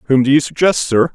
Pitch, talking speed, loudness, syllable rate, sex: 140 Hz, 260 wpm, -14 LUFS, 6.2 syllables/s, male